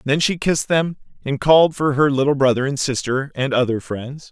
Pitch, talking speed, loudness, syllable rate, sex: 140 Hz, 210 wpm, -18 LUFS, 5.4 syllables/s, male